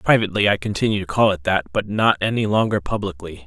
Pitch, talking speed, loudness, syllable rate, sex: 100 Hz, 210 wpm, -20 LUFS, 6.4 syllables/s, male